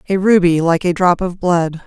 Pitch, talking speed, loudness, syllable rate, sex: 175 Hz, 225 wpm, -14 LUFS, 4.8 syllables/s, female